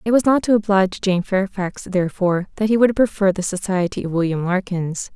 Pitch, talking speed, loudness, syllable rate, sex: 195 Hz, 210 wpm, -19 LUFS, 6.1 syllables/s, female